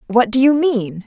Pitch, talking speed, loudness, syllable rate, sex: 240 Hz, 225 wpm, -15 LUFS, 4.5 syllables/s, female